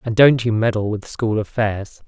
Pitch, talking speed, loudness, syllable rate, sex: 110 Hz, 205 wpm, -19 LUFS, 4.7 syllables/s, male